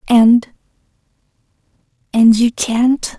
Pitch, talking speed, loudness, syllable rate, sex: 220 Hz, 75 wpm, -13 LUFS, 2.9 syllables/s, female